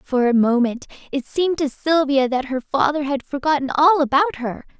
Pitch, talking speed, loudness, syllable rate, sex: 280 Hz, 190 wpm, -19 LUFS, 5.4 syllables/s, female